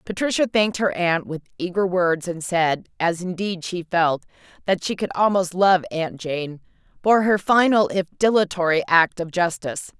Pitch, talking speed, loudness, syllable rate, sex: 180 Hz, 170 wpm, -21 LUFS, 4.7 syllables/s, female